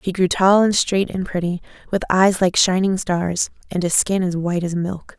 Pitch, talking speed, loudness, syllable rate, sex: 185 Hz, 220 wpm, -19 LUFS, 4.8 syllables/s, female